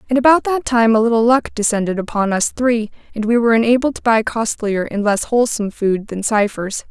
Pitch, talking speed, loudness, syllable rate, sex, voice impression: 225 Hz, 210 wpm, -16 LUFS, 5.8 syllables/s, female, very feminine, young, slightly adult-like, very thin, very tensed, powerful, slightly bright, slightly soft, clear, fluent, slightly raspy, very cute, intellectual, very refreshing, sincere, slightly calm, friendly, reassuring, very unique, elegant, slightly wild, sweet, lively, kind, intense, slightly modest, slightly light